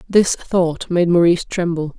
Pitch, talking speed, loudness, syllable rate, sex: 175 Hz, 150 wpm, -17 LUFS, 4.4 syllables/s, female